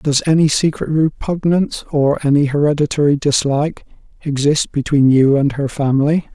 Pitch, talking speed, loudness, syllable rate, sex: 145 Hz, 130 wpm, -15 LUFS, 5.2 syllables/s, male